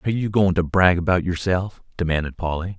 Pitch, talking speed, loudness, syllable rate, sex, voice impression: 90 Hz, 195 wpm, -21 LUFS, 5.9 syllables/s, male, very masculine, very adult-like, middle-aged, very thick, tensed, very powerful, slightly bright, hard, slightly soft, muffled, fluent, slightly raspy, very cool, intellectual, very sincere, very calm, very mature, very friendly, very reassuring, very unique, very elegant, slightly wild, very sweet, very kind, slightly modest